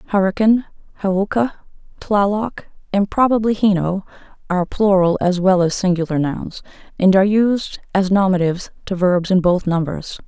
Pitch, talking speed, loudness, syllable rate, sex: 190 Hz, 135 wpm, -17 LUFS, 5.0 syllables/s, female